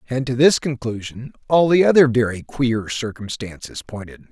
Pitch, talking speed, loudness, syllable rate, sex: 125 Hz, 155 wpm, -19 LUFS, 4.9 syllables/s, male